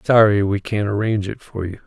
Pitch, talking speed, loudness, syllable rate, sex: 105 Hz, 225 wpm, -19 LUFS, 6.0 syllables/s, male